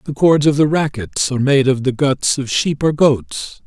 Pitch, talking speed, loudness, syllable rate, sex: 135 Hz, 230 wpm, -16 LUFS, 4.6 syllables/s, male